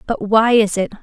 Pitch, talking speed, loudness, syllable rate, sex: 215 Hz, 235 wpm, -15 LUFS, 5.1 syllables/s, female